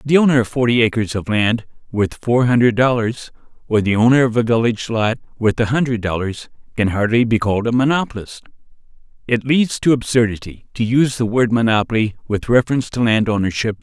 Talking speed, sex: 180 wpm, male